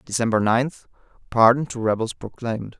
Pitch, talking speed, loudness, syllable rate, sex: 115 Hz, 130 wpm, -21 LUFS, 5.3 syllables/s, male